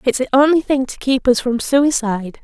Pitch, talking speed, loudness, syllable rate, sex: 255 Hz, 220 wpm, -16 LUFS, 5.4 syllables/s, female